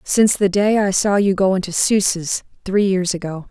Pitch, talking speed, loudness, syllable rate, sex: 190 Hz, 205 wpm, -17 LUFS, 5.0 syllables/s, female